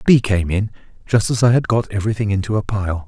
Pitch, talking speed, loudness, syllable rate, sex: 105 Hz, 235 wpm, -18 LUFS, 6.2 syllables/s, male